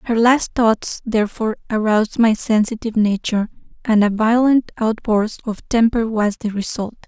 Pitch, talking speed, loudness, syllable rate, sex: 220 Hz, 145 wpm, -18 LUFS, 5.0 syllables/s, female